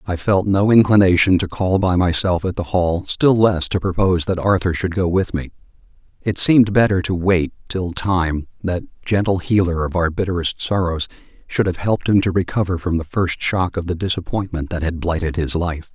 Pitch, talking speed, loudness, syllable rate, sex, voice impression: 90 Hz, 195 wpm, -18 LUFS, 5.2 syllables/s, male, middle-aged, thick, tensed, powerful, hard, fluent, cool, intellectual, sincere, calm, mature, friendly, reassuring, elegant, wild, lively, kind